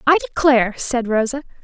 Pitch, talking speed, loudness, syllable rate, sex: 265 Hz, 145 wpm, -18 LUFS, 5.9 syllables/s, female